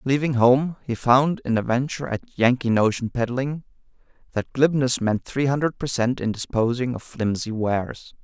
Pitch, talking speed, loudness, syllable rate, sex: 130 Hz, 170 wpm, -22 LUFS, 4.9 syllables/s, male